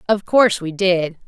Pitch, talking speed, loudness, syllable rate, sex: 190 Hz, 190 wpm, -17 LUFS, 4.9 syllables/s, female